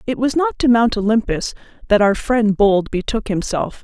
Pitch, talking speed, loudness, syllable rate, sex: 220 Hz, 190 wpm, -17 LUFS, 4.8 syllables/s, female